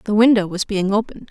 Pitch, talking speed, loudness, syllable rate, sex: 205 Hz, 230 wpm, -18 LUFS, 6.8 syllables/s, female